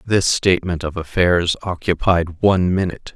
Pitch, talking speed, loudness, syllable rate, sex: 90 Hz, 135 wpm, -18 LUFS, 5.0 syllables/s, male